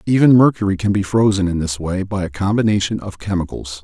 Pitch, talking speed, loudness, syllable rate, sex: 100 Hz, 205 wpm, -17 LUFS, 6.0 syllables/s, male